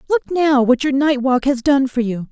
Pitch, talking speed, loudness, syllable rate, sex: 265 Hz, 260 wpm, -16 LUFS, 4.7 syllables/s, female